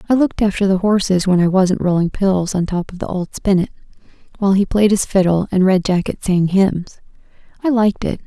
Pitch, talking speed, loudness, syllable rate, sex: 190 Hz, 210 wpm, -16 LUFS, 5.7 syllables/s, female